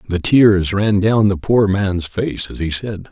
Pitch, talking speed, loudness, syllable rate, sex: 100 Hz, 210 wpm, -16 LUFS, 3.8 syllables/s, male